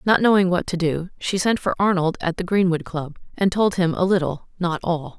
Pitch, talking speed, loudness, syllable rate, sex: 180 Hz, 230 wpm, -21 LUFS, 5.3 syllables/s, female